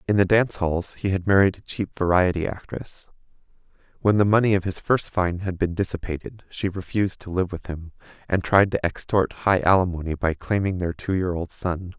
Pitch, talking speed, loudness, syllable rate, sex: 95 Hz, 200 wpm, -23 LUFS, 5.3 syllables/s, male